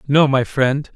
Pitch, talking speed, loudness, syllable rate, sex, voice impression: 135 Hz, 190 wpm, -17 LUFS, 3.9 syllables/s, male, masculine, adult-like, slightly clear, slightly refreshing, sincere, slightly calm